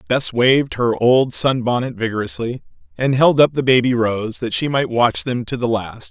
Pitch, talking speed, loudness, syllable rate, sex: 120 Hz, 205 wpm, -17 LUFS, 4.8 syllables/s, male